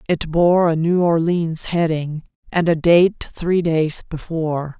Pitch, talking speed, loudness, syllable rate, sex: 165 Hz, 150 wpm, -18 LUFS, 3.7 syllables/s, female